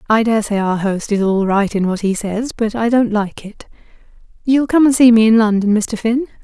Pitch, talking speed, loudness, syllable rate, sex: 220 Hz, 240 wpm, -15 LUFS, 5.1 syllables/s, female